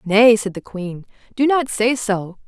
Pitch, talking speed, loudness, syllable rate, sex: 220 Hz, 195 wpm, -18 LUFS, 3.9 syllables/s, female